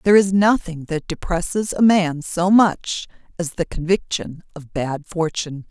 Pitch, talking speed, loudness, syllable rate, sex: 175 Hz, 160 wpm, -20 LUFS, 4.5 syllables/s, female